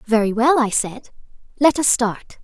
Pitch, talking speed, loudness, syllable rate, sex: 240 Hz, 170 wpm, -18 LUFS, 4.4 syllables/s, female